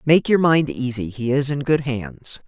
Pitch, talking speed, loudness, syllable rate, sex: 145 Hz, 220 wpm, -20 LUFS, 4.3 syllables/s, female